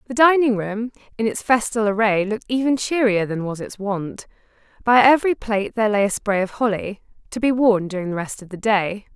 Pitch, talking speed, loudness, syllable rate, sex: 215 Hz, 210 wpm, -20 LUFS, 5.7 syllables/s, female